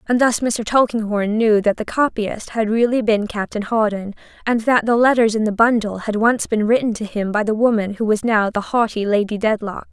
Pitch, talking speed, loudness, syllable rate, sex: 220 Hz, 220 wpm, -18 LUFS, 5.2 syllables/s, female